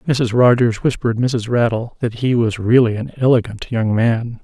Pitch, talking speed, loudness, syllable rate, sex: 120 Hz, 175 wpm, -17 LUFS, 4.8 syllables/s, male